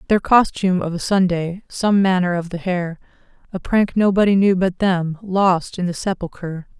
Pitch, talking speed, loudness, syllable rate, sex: 185 Hz, 175 wpm, -19 LUFS, 4.8 syllables/s, female